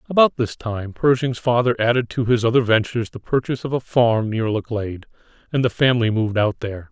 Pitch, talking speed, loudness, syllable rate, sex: 120 Hz, 200 wpm, -20 LUFS, 6.1 syllables/s, male